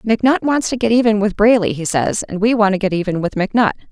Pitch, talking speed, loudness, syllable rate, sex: 210 Hz, 260 wpm, -16 LUFS, 6.5 syllables/s, female